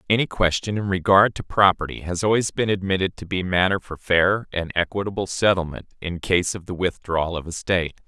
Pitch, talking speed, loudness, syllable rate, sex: 90 Hz, 195 wpm, -22 LUFS, 5.6 syllables/s, male